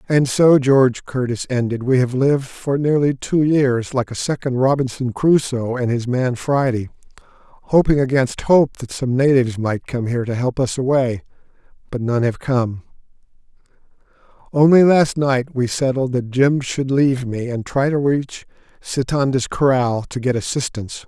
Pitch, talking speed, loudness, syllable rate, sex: 130 Hz, 160 wpm, -18 LUFS, 4.7 syllables/s, male